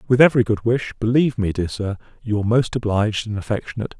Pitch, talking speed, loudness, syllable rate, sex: 110 Hz, 195 wpm, -20 LUFS, 6.6 syllables/s, male